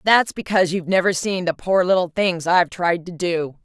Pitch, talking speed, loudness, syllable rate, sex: 180 Hz, 215 wpm, -19 LUFS, 5.5 syllables/s, female